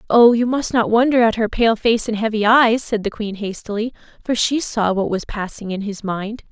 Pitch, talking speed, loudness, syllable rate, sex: 220 Hz, 230 wpm, -18 LUFS, 5.1 syllables/s, female